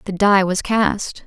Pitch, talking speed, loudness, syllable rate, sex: 195 Hz, 190 wpm, -17 LUFS, 3.5 syllables/s, female